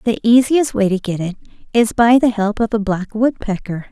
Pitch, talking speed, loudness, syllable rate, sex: 220 Hz, 215 wpm, -16 LUFS, 5.1 syllables/s, female